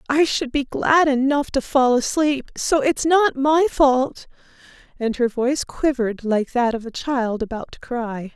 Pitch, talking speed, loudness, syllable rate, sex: 265 Hz, 180 wpm, -20 LUFS, 4.3 syllables/s, female